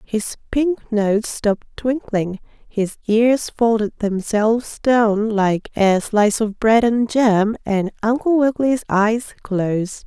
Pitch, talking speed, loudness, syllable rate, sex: 220 Hz, 130 wpm, -18 LUFS, 3.6 syllables/s, female